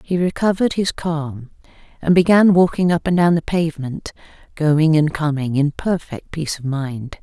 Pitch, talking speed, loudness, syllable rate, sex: 160 Hz, 165 wpm, -18 LUFS, 4.9 syllables/s, female